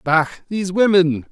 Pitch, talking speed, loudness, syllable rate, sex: 175 Hz, 135 wpm, -17 LUFS, 5.3 syllables/s, male